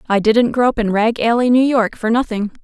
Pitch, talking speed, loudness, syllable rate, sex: 230 Hz, 250 wpm, -15 LUFS, 5.5 syllables/s, female